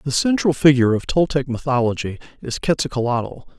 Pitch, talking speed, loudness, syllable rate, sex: 135 Hz, 135 wpm, -19 LUFS, 5.4 syllables/s, male